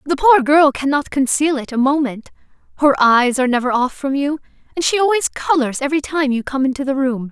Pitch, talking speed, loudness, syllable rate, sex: 275 Hz, 215 wpm, -16 LUFS, 5.8 syllables/s, female